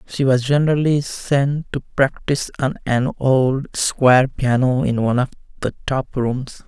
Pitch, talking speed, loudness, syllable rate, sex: 135 Hz, 155 wpm, -19 LUFS, 4.2 syllables/s, male